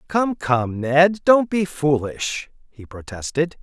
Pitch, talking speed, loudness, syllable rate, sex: 155 Hz, 130 wpm, -20 LUFS, 3.4 syllables/s, male